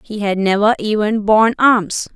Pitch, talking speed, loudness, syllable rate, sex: 215 Hz, 165 wpm, -15 LUFS, 4.7 syllables/s, female